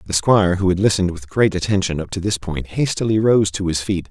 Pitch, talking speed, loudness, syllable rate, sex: 95 Hz, 250 wpm, -18 LUFS, 6.1 syllables/s, male